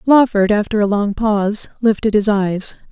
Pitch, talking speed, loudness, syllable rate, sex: 210 Hz, 165 wpm, -16 LUFS, 4.7 syllables/s, female